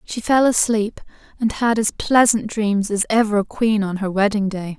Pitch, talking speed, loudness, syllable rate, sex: 215 Hz, 200 wpm, -19 LUFS, 4.6 syllables/s, female